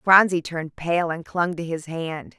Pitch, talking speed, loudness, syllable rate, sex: 170 Hz, 200 wpm, -23 LUFS, 4.4 syllables/s, female